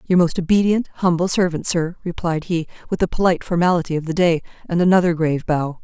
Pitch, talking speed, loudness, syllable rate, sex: 170 Hz, 195 wpm, -19 LUFS, 6.4 syllables/s, female